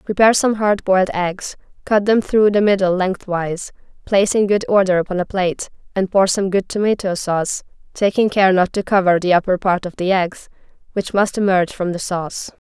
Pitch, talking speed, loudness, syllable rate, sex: 190 Hz, 195 wpm, -17 LUFS, 5.5 syllables/s, female